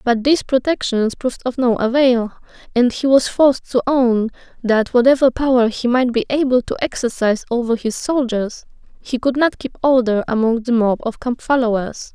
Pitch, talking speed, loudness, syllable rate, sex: 245 Hz, 175 wpm, -17 LUFS, 5.2 syllables/s, female